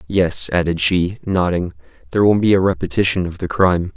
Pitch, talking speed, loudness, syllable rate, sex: 90 Hz, 180 wpm, -17 LUFS, 5.7 syllables/s, male